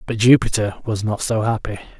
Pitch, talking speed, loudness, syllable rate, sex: 110 Hz, 180 wpm, -19 LUFS, 5.5 syllables/s, male